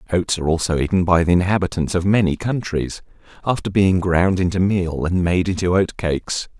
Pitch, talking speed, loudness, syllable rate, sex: 90 Hz, 180 wpm, -19 LUFS, 5.5 syllables/s, male